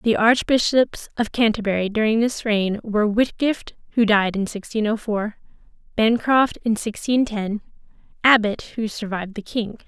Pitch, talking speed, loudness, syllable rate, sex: 220 Hz, 145 wpm, -21 LUFS, 4.7 syllables/s, female